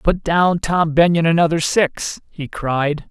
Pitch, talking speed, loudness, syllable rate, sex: 165 Hz, 155 wpm, -17 LUFS, 3.7 syllables/s, male